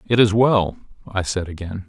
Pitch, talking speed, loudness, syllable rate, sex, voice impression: 100 Hz, 190 wpm, -20 LUFS, 4.8 syllables/s, male, masculine, adult-like, slightly thick, cool, slightly intellectual, slightly refreshing